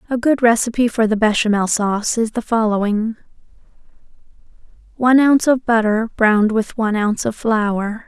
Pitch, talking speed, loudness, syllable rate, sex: 225 Hz, 150 wpm, -17 LUFS, 5.5 syllables/s, female